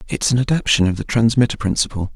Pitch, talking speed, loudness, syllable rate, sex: 115 Hz, 195 wpm, -18 LUFS, 7.1 syllables/s, male